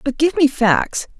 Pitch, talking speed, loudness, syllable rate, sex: 280 Hz, 200 wpm, -17 LUFS, 4.0 syllables/s, female